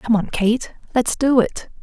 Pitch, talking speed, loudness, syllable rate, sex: 235 Hz, 195 wpm, -19 LUFS, 4.3 syllables/s, female